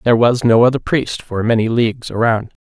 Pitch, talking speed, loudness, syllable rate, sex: 115 Hz, 205 wpm, -15 LUFS, 5.7 syllables/s, male